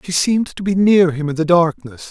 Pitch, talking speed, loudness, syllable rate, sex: 170 Hz, 255 wpm, -16 LUFS, 5.5 syllables/s, male